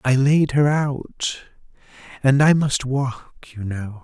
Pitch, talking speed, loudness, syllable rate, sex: 130 Hz, 150 wpm, -20 LUFS, 3.3 syllables/s, male